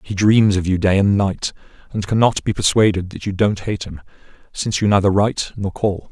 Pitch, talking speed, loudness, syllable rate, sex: 100 Hz, 215 wpm, -18 LUFS, 5.5 syllables/s, male